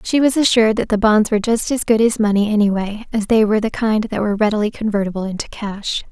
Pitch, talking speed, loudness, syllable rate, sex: 215 Hz, 235 wpm, -17 LUFS, 6.4 syllables/s, female